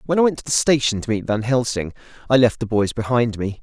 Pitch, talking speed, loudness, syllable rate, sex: 120 Hz, 265 wpm, -19 LUFS, 6.1 syllables/s, male